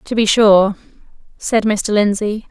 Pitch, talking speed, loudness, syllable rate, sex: 210 Hz, 145 wpm, -14 LUFS, 3.9 syllables/s, female